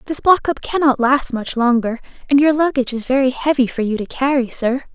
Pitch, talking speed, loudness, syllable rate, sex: 260 Hz, 220 wpm, -17 LUFS, 5.7 syllables/s, female